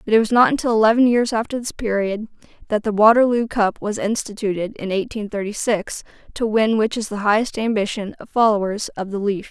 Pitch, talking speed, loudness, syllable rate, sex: 215 Hz, 200 wpm, -19 LUFS, 5.4 syllables/s, female